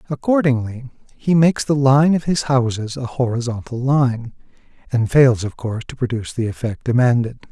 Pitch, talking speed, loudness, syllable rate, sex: 125 Hz, 160 wpm, -18 LUFS, 5.3 syllables/s, male